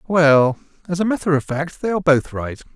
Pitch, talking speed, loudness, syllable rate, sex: 160 Hz, 220 wpm, -18 LUFS, 5.4 syllables/s, male